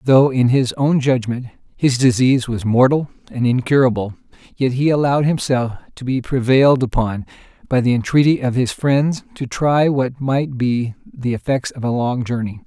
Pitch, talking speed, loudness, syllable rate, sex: 130 Hz, 170 wpm, -17 LUFS, 4.9 syllables/s, male